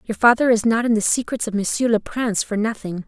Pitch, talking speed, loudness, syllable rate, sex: 220 Hz, 255 wpm, -19 LUFS, 6.1 syllables/s, female